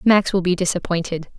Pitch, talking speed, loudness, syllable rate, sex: 180 Hz, 175 wpm, -20 LUFS, 5.7 syllables/s, female